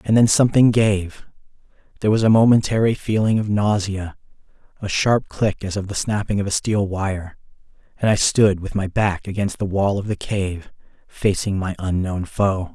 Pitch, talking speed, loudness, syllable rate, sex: 100 Hz, 180 wpm, -20 LUFS, 4.9 syllables/s, male